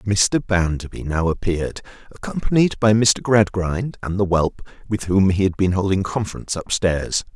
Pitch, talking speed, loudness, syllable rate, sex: 95 Hz, 165 wpm, -20 LUFS, 4.8 syllables/s, male